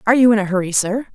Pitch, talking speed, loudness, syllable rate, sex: 215 Hz, 315 wpm, -16 LUFS, 8.4 syllables/s, female